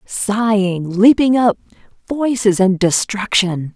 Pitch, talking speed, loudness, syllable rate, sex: 210 Hz, 95 wpm, -15 LUFS, 3.5 syllables/s, female